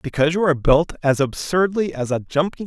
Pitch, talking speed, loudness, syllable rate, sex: 160 Hz, 205 wpm, -19 LUFS, 5.7 syllables/s, male